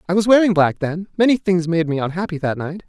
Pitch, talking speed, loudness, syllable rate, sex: 175 Hz, 250 wpm, -18 LUFS, 6.2 syllables/s, male